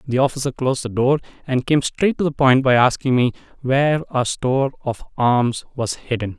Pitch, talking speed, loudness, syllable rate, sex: 130 Hz, 195 wpm, -19 LUFS, 5.2 syllables/s, male